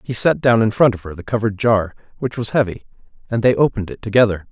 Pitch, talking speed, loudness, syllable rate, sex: 110 Hz, 215 wpm, -18 LUFS, 6.8 syllables/s, male